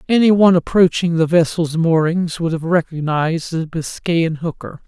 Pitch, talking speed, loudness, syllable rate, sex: 165 Hz, 150 wpm, -17 LUFS, 4.9 syllables/s, male